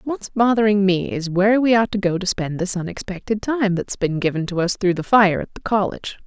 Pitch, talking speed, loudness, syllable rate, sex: 195 Hz, 240 wpm, -20 LUFS, 5.6 syllables/s, female